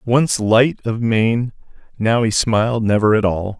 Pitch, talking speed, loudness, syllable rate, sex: 115 Hz, 165 wpm, -17 LUFS, 4.0 syllables/s, male